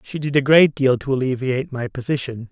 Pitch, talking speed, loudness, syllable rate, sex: 135 Hz, 215 wpm, -19 LUFS, 5.8 syllables/s, male